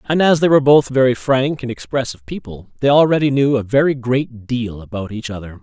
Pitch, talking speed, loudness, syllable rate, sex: 125 Hz, 215 wpm, -16 LUFS, 5.7 syllables/s, male